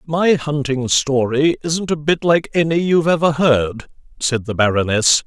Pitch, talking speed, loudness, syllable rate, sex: 145 Hz, 160 wpm, -17 LUFS, 4.6 syllables/s, male